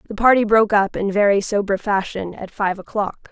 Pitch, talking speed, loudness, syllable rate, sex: 205 Hz, 200 wpm, -19 LUFS, 5.5 syllables/s, female